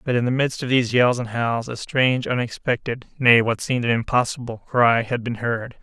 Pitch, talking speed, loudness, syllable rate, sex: 120 Hz, 195 wpm, -21 LUFS, 5.4 syllables/s, male